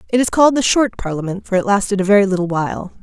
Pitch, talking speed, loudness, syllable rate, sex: 200 Hz, 260 wpm, -16 LUFS, 7.3 syllables/s, female